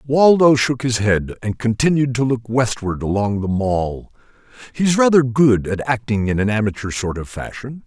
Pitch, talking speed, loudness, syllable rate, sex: 120 Hz, 175 wpm, -18 LUFS, 4.7 syllables/s, male